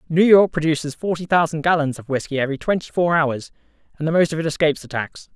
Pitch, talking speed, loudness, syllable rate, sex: 155 Hz, 225 wpm, -19 LUFS, 6.6 syllables/s, male